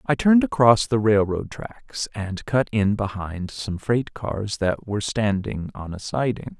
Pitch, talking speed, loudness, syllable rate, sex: 105 Hz, 175 wpm, -23 LUFS, 4.1 syllables/s, male